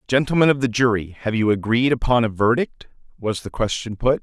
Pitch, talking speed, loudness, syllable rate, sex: 120 Hz, 200 wpm, -20 LUFS, 5.6 syllables/s, male